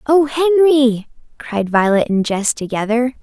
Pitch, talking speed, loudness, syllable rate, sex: 245 Hz, 130 wpm, -15 LUFS, 4.4 syllables/s, female